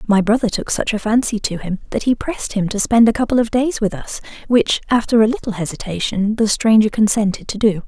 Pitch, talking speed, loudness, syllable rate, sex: 220 Hz, 230 wpm, -17 LUFS, 5.8 syllables/s, female